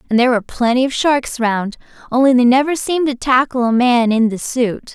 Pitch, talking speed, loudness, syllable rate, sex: 250 Hz, 220 wpm, -15 LUFS, 5.7 syllables/s, female